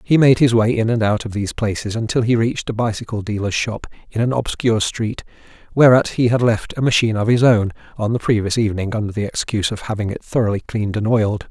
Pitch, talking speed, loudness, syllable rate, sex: 110 Hz, 230 wpm, -18 LUFS, 6.4 syllables/s, male